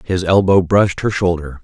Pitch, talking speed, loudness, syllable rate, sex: 90 Hz, 185 wpm, -15 LUFS, 5.2 syllables/s, male